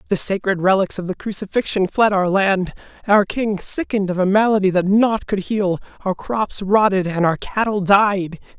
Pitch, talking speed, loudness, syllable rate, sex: 195 Hz, 180 wpm, -18 LUFS, 4.8 syllables/s, male